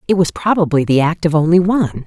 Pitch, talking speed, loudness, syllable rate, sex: 165 Hz, 235 wpm, -14 LUFS, 6.3 syllables/s, female